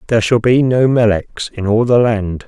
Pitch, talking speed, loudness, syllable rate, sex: 115 Hz, 220 wpm, -14 LUFS, 4.9 syllables/s, male